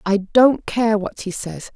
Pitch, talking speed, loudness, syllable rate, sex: 210 Hz, 205 wpm, -18 LUFS, 3.6 syllables/s, female